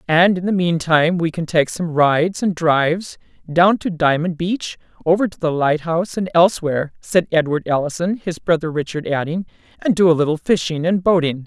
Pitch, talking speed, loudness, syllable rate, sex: 170 Hz, 185 wpm, -18 LUFS, 5.3 syllables/s, female